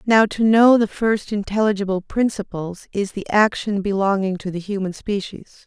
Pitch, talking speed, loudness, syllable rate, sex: 200 Hz, 160 wpm, -20 LUFS, 4.7 syllables/s, female